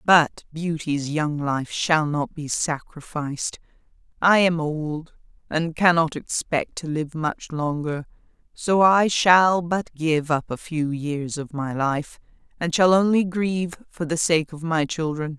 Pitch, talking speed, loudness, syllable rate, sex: 160 Hz, 155 wpm, -22 LUFS, 3.8 syllables/s, female